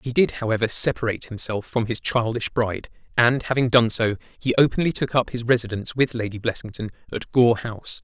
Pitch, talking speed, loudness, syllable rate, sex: 115 Hz, 185 wpm, -22 LUFS, 5.9 syllables/s, male